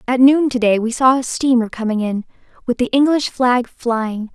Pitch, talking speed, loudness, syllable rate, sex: 245 Hz, 205 wpm, -17 LUFS, 4.8 syllables/s, female